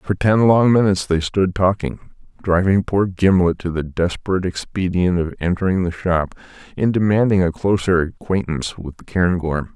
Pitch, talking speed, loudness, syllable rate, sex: 90 Hz, 160 wpm, -18 LUFS, 5.1 syllables/s, male